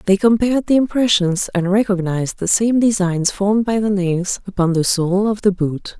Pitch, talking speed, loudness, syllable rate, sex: 200 Hz, 190 wpm, -17 LUFS, 5.1 syllables/s, female